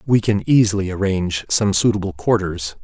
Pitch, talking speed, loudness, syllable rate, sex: 100 Hz, 150 wpm, -18 LUFS, 5.3 syllables/s, male